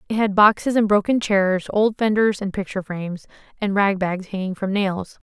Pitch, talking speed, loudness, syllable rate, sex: 200 Hz, 195 wpm, -20 LUFS, 5.1 syllables/s, female